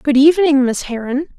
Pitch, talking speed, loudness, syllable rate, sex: 280 Hz, 175 wpm, -15 LUFS, 5.5 syllables/s, female